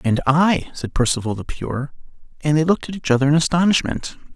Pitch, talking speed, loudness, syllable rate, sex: 150 Hz, 195 wpm, -19 LUFS, 5.9 syllables/s, male